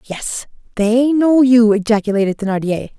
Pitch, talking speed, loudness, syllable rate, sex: 225 Hz, 120 wpm, -15 LUFS, 4.7 syllables/s, female